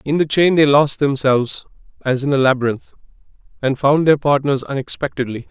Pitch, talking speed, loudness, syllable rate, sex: 140 Hz, 165 wpm, -17 LUFS, 5.5 syllables/s, male